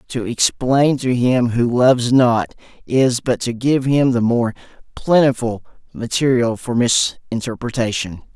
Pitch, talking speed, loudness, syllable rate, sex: 120 Hz, 130 wpm, -17 LUFS, 4.1 syllables/s, male